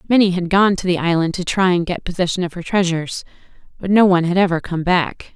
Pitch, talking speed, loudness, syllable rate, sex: 180 Hz, 235 wpm, -17 LUFS, 6.3 syllables/s, female